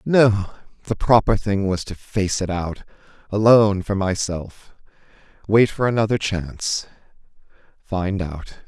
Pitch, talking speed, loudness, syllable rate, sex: 100 Hz, 105 wpm, -20 LUFS, 4.2 syllables/s, male